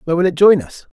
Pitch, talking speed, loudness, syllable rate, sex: 170 Hz, 305 wpm, -14 LUFS, 7.6 syllables/s, male